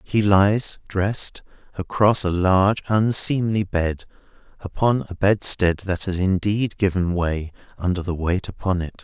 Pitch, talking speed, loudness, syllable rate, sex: 95 Hz, 140 wpm, -21 LUFS, 4.2 syllables/s, male